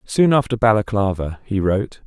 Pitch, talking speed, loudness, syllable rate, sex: 105 Hz, 145 wpm, -19 LUFS, 5.2 syllables/s, male